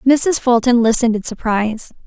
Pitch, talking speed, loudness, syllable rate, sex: 240 Hz, 145 wpm, -15 LUFS, 5.5 syllables/s, female